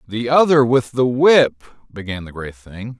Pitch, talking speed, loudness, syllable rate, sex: 115 Hz, 180 wpm, -15 LUFS, 4.5 syllables/s, male